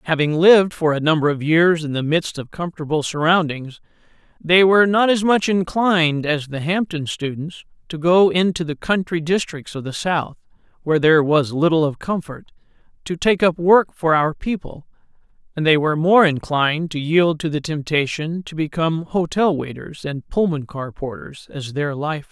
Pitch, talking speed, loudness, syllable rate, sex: 160 Hz, 180 wpm, -18 LUFS, 5.1 syllables/s, male